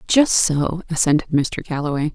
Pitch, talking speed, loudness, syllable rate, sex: 160 Hz, 140 wpm, -19 LUFS, 4.8 syllables/s, female